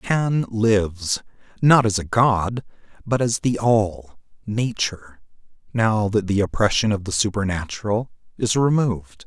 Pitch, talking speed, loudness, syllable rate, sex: 105 Hz, 130 wpm, -21 LUFS, 4.2 syllables/s, male